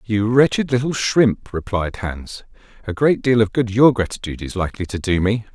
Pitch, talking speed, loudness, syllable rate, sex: 110 Hz, 195 wpm, -19 LUFS, 5.2 syllables/s, male